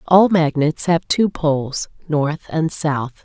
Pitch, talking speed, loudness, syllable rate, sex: 160 Hz, 150 wpm, -18 LUFS, 3.6 syllables/s, female